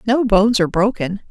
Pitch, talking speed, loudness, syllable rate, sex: 210 Hz, 185 wpm, -16 LUFS, 6.3 syllables/s, female